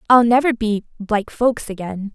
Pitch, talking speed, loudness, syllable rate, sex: 220 Hz, 140 wpm, -19 LUFS, 4.7 syllables/s, female